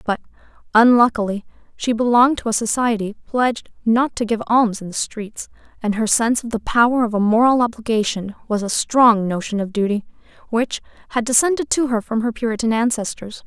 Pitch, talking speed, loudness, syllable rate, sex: 230 Hz, 180 wpm, -18 LUFS, 5.6 syllables/s, female